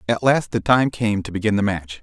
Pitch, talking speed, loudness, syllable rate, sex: 105 Hz, 265 wpm, -20 LUFS, 5.4 syllables/s, male